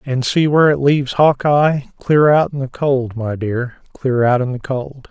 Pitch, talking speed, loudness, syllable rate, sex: 135 Hz, 210 wpm, -16 LUFS, 4.5 syllables/s, male